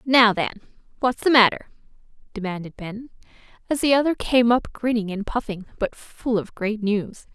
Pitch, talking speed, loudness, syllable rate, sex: 225 Hz, 165 wpm, -22 LUFS, 4.8 syllables/s, female